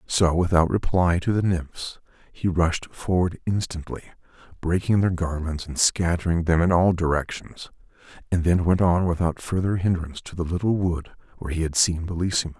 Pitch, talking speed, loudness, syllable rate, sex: 85 Hz, 165 wpm, -23 LUFS, 5.2 syllables/s, male